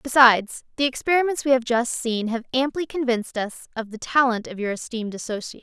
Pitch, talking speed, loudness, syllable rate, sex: 245 Hz, 190 wpm, -22 LUFS, 6.1 syllables/s, female